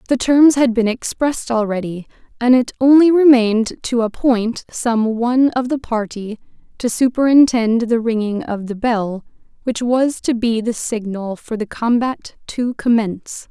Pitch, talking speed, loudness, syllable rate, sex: 235 Hz, 155 wpm, -17 LUFS, 4.5 syllables/s, female